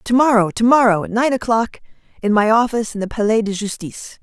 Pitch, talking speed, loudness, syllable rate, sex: 220 Hz, 200 wpm, -17 LUFS, 6.1 syllables/s, female